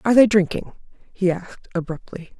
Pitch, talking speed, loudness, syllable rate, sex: 185 Hz, 150 wpm, -21 LUFS, 5.9 syllables/s, female